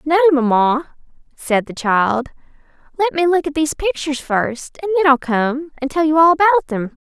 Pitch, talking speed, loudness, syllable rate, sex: 280 Hz, 190 wpm, -17 LUFS, 5.0 syllables/s, female